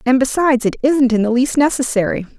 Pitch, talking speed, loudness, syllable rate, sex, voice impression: 255 Hz, 200 wpm, -15 LUFS, 6.2 syllables/s, female, feminine, adult-like, slightly soft, slightly fluent, slightly calm, friendly, slightly kind